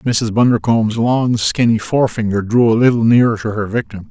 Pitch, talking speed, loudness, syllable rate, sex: 115 Hz, 175 wpm, -15 LUFS, 5.4 syllables/s, male